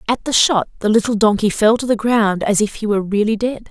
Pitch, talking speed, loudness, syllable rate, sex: 215 Hz, 260 wpm, -16 LUFS, 5.9 syllables/s, female